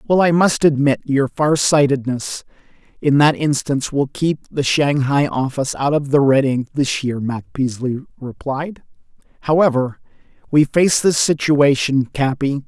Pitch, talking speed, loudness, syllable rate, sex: 140 Hz, 145 wpm, -17 LUFS, 4.4 syllables/s, male